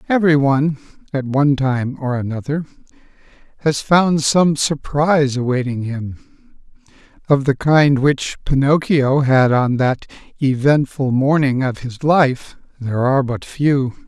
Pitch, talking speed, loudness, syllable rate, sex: 140 Hz, 125 wpm, -17 LUFS, 4.1 syllables/s, male